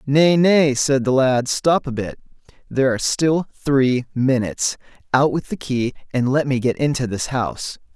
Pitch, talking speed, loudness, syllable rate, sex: 135 Hz, 180 wpm, -19 LUFS, 4.7 syllables/s, male